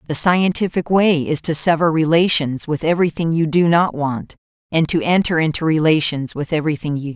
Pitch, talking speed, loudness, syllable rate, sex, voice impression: 160 Hz, 195 wpm, -17 LUFS, 5.7 syllables/s, female, feminine, very adult-like, slightly clear, intellectual, elegant